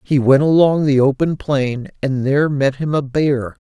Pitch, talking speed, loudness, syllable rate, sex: 140 Hz, 195 wpm, -16 LUFS, 4.5 syllables/s, male